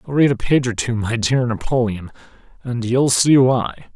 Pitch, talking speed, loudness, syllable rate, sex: 120 Hz, 180 wpm, -18 LUFS, 4.3 syllables/s, male